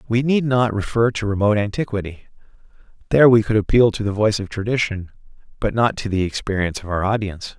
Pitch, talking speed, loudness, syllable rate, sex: 110 Hz, 190 wpm, -19 LUFS, 6.5 syllables/s, male